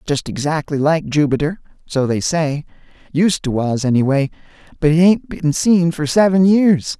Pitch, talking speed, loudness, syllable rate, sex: 155 Hz, 155 wpm, -16 LUFS, 4.6 syllables/s, male